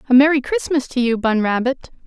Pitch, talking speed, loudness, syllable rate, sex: 265 Hz, 205 wpm, -18 LUFS, 5.8 syllables/s, female